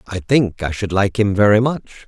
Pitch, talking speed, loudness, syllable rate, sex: 105 Hz, 230 wpm, -17 LUFS, 4.7 syllables/s, male